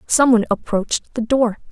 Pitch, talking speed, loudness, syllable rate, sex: 230 Hz, 175 wpm, -18 LUFS, 6.1 syllables/s, female